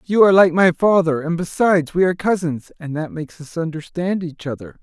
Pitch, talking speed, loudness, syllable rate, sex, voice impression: 170 Hz, 210 wpm, -18 LUFS, 5.8 syllables/s, male, masculine, adult-like, slightly bright, refreshing, slightly unique